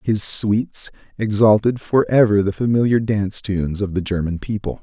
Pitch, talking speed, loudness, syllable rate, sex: 105 Hz, 150 wpm, -18 LUFS, 5.2 syllables/s, male